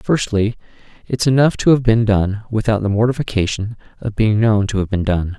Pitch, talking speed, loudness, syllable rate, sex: 110 Hz, 190 wpm, -17 LUFS, 5.3 syllables/s, male